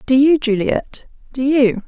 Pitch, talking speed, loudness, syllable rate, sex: 260 Hz, 130 wpm, -16 LUFS, 4.0 syllables/s, female